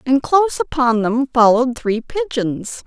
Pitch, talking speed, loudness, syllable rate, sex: 260 Hz, 145 wpm, -17 LUFS, 4.4 syllables/s, female